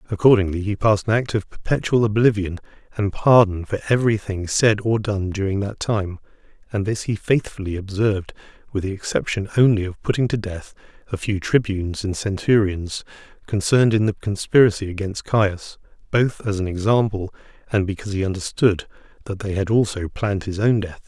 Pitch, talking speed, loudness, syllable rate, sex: 100 Hz, 170 wpm, -21 LUFS, 5.6 syllables/s, male